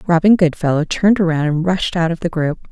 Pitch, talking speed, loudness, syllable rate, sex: 170 Hz, 220 wpm, -16 LUFS, 6.1 syllables/s, female